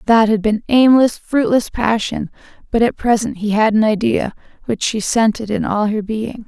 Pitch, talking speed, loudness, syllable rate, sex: 220 Hz, 185 wpm, -16 LUFS, 4.7 syllables/s, female